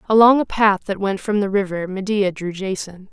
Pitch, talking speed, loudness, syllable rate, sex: 200 Hz, 210 wpm, -19 LUFS, 5.1 syllables/s, female